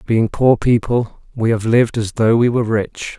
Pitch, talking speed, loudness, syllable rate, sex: 115 Hz, 205 wpm, -16 LUFS, 4.8 syllables/s, male